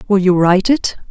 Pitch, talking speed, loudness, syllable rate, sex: 195 Hz, 215 wpm, -13 LUFS, 6.1 syllables/s, female